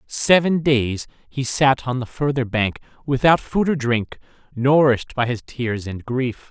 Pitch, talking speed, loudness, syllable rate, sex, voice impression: 130 Hz, 165 wpm, -20 LUFS, 4.2 syllables/s, male, masculine, adult-like, bright, clear, fluent, intellectual, slightly refreshing, sincere, friendly, slightly unique, kind, light